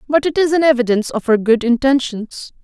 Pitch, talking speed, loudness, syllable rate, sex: 255 Hz, 205 wpm, -15 LUFS, 5.8 syllables/s, female